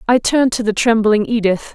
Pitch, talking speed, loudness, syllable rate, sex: 225 Hz, 205 wpm, -15 LUFS, 5.7 syllables/s, female